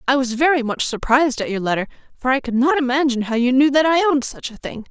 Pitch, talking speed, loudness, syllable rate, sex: 260 Hz, 270 wpm, -18 LUFS, 6.7 syllables/s, female